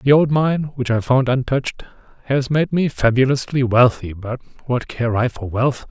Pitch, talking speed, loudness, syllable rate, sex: 130 Hz, 185 wpm, -18 LUFS, 4.8 syllables/s, male